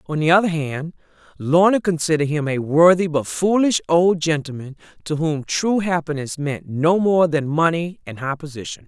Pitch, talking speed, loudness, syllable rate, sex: 160 Hz, 170 wpm, -19 LUFS, 4.9 syllables/s, female